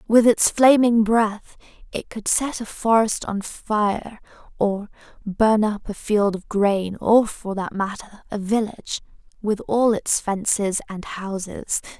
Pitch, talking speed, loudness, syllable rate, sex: 210 Hz, 150 wpm, -21 LUFS, 3.7 syllables/s, female